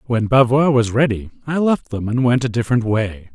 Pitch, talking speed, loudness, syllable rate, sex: 120 Hz, 215 wpm, -17 LUFS, 5.5 syllables/s, male